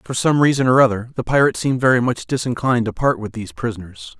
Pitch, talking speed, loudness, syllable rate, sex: 125 Hz, 230 wpm, -18 LUFS, 7.0 syllables/s, male